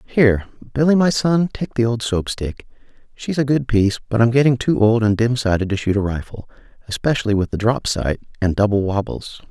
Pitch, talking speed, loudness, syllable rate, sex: 115 Hz, 210 wpm, -19 LUFS, 5.6 syllables/s, male